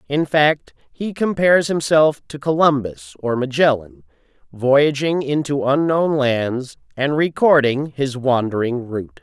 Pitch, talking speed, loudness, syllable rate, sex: 140 Hz, 115 wpm, -18 LUFS, 4.0 syllables/s, male